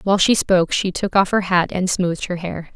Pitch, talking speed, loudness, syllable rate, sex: 185 Hz, 260 wpm, -18 LUFS, 5.8 syllables/s, female